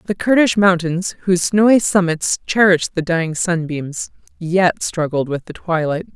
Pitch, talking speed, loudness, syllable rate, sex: 175 Hz, 145 wpm, -17 LUFS, 4.7 syllables/s, female